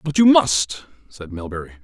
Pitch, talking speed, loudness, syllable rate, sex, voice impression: 110 Hz, 165 wpm, -17 LUFS, 5.0 syllables/s, male, very masculine, very adult-like, middle-aged, thick, tensed, powerful, bright, soft, slightly muffled, fluent, slightly raspy, very cool, very intellectual, slightly refreshing, very sincere, very calm, very mature, very friendly, very reassuring, very unique, elegant, very wild, sweet, lively, kind, slightly modest